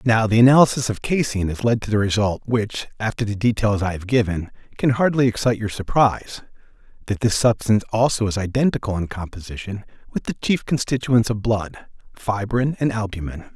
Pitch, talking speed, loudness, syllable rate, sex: 110 Hz, 175 wpm, -20 LUFS, 5.8 syllables/s, male